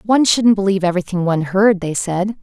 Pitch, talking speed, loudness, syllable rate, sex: 195 Hz, 200 wpm, -16 LUFS, 6.6 syllables/s, female